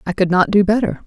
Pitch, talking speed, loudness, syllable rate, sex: 200 Hz, 280 wpm, -15 LUFS, 6.6 syllables/s, female